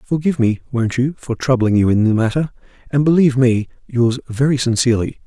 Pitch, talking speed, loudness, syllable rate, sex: 125 Hz, 180 wpm, -17 LUFS, 6.1 syllables/s, male